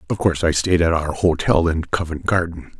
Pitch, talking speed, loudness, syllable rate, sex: 85 Hz, 215 wpm, -19 LUFS, 5.5 syllables/s, male